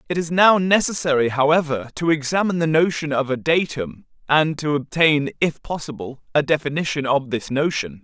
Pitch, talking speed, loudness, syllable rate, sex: 150 Hz, 165 wpm, -20 LUFS, 5.3 syllables/s, male